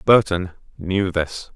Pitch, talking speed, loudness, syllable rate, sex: 90 Hz, 115 wpm, -21 LUFS, 3.4 syllables/s, male